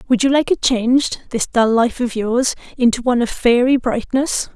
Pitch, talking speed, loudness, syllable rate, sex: 245 Hz, 170 wpm, -17 LUFS, 4.9 syllables/s, female